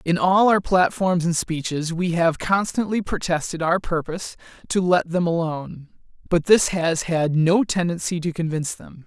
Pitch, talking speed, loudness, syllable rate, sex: 170 Hz, 165 wpm, -21 LUFS, 4.7 syllables/s, male